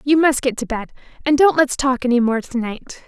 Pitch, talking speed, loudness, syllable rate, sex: 260 Hz, 235 wpm, -18 LUFS, 5.3 syllables/s, female